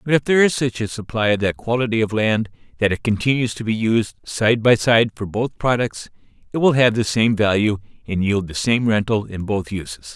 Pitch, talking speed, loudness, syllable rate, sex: 110 Hz, 225 wpm, -19 LUFS, 5.4 syllables/s, male